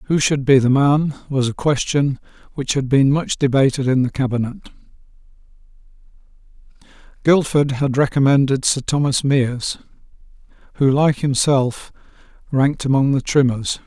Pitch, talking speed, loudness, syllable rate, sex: 135 Hz, 125 wpm, -18 LUFS, 4.9 syllables/s, male